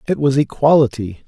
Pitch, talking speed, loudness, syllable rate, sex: 135 Hz, 140 wpm, -15 LUFS, 5.3 syllables/s, male